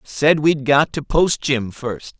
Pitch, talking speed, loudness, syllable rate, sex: 140 Hz, 190 wpm, -18 LUFS, 3.4 syllables/s, male